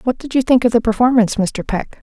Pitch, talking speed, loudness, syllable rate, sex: 235 Hz, 255 wpm, -16 LUFS, 6.2 syllables/s, female